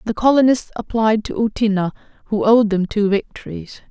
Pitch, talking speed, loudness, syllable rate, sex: 215 Hz, 155 wpm, -17 LUFS, 5.2 syllables/s, female